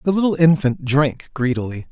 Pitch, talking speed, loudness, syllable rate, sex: 145 Hz, 155 wpm, -18 LUFS, 5.1 syllables/s, male